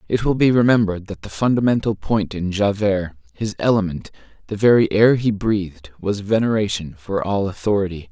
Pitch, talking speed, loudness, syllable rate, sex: 100 Hz, 165 wpm, -19 LUFS, 5.4 syllables/s, male